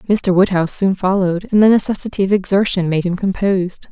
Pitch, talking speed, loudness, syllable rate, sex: 190 Hz, 185 wpm, -16 LUFS, 6.0 syllables/s, female